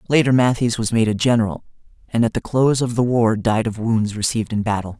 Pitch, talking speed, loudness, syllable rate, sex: 115 Hz, 230 wpm, -19 LUFS, 6.2 syllables/s, male